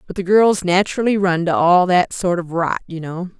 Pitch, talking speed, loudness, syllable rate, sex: 180 Hz, 230 wpm, -17 LUFS, 5.2 syllables/s, female